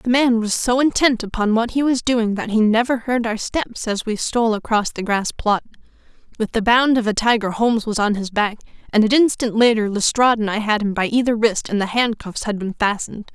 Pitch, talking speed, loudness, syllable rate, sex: 225 Hz, 235 wpm, -19 LUFS, 5.5 syllables/s, female